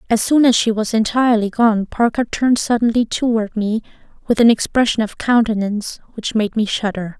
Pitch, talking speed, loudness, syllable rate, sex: 225 Hz, 175 wpm, -17 LUFS, 5.5 syllables/s, female